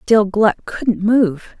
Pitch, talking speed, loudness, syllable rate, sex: 205 Hz, 150 wpm, -16 LUFS, 2.6 syllables/s, female